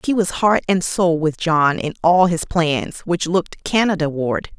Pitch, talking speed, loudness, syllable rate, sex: 170 Hz, 195 wpm, -18 LUFS, 4.2 syllables/s, female